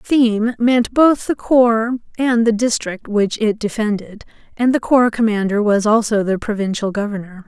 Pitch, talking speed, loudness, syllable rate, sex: 220 Hz, 160 wpm, -17 LUFS, 4.6 syllables/s, female